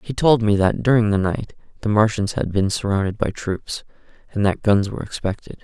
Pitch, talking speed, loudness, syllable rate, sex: 105 Hz, 200 wpm, -20 LUFS, 5.5 syllables/s, male